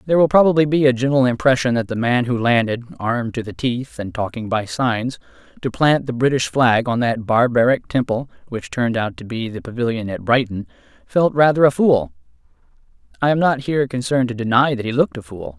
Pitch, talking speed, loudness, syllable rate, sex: 125 Hz, 210 wpm, -18 LUFS, 5.4 syllables/s, male